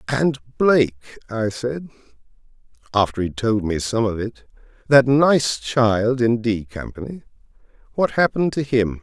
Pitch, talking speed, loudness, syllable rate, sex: 120 Hz, 140 wpm, -20 LUFS, 4.4 syllables/s, male